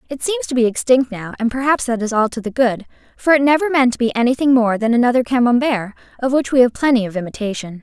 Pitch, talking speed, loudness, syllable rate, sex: 245 Hz, 245 wpm, -17 LUFS, 6.5 syllables/s, female